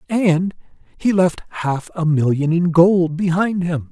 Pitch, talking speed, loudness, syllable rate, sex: 170 Hz, 140 wpm, -18 LUFS, 3.8 syllables/s, male